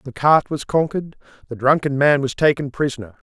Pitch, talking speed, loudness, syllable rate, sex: 140 Hz, 180 wpm, -19 LUFS, 5.9 syllables/s, male